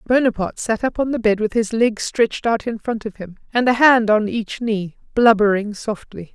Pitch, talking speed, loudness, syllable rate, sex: 220 Hz, 220 wpm, -19 LUFS, 5.1 syllables/s, female